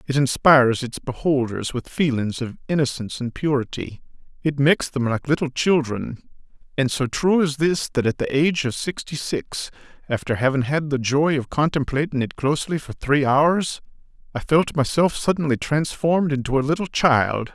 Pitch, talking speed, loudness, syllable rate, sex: 140 Hz, 170 wpm, -21 LUFS, 5.1 syllables/s, male